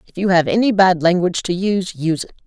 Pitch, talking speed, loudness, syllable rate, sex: 185 Hz, 245 wpm, -17 LUFS, 6.7 syllables/s, female